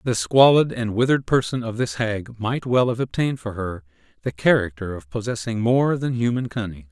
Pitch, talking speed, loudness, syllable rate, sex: 115 Hz, 190 wpm, -21 LUFS, 5.3 syllables/s, male